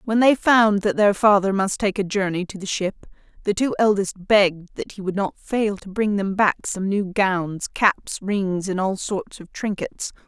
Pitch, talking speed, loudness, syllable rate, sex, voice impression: 200 Hz, 205 wpm, -21 LUFS, 4.3 syllables/s, female, feminine, adult-like, tensed, powerful, soft, clear, fluent, intellectual, calm, reassuring, elegant, lively, slightly kind